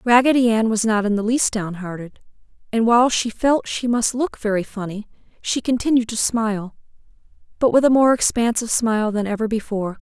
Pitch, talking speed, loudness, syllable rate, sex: 225 Hz, 180 wpm, -19 LUFS, 5.7 syllables/s, female